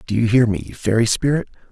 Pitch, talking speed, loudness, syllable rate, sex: 110 Hz, 245 wpm, -18 LUFS, 6.6 syllables/s, male